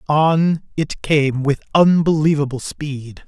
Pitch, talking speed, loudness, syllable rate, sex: 150 Hz, 110 wpm, -17 LUFS, 3.5 syllables/s, male